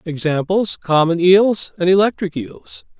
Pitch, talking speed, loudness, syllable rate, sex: 180 Hz, 120 wpm, -16 LUFS, 4.1 syllables/s, male